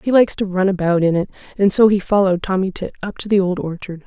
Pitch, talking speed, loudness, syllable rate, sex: 190 Hz, 265 wpm, -17 LUFS, 6.7 syllables/s, female